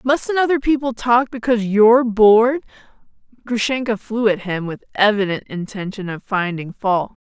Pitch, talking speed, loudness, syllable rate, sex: 220 Hz, 140 wpm, -18 LUFS, 5.0 syllables/s, female